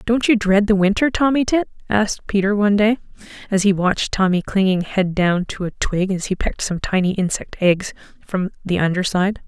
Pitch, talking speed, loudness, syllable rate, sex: 200 Hz, 205 wpm, -19 LUFS, 5.4 syllables/s, female